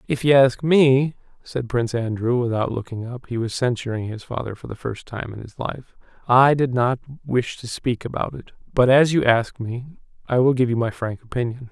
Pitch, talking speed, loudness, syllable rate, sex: 125 Hz, 215 wpm, -21 LUFS, 4.0 syllables/s, male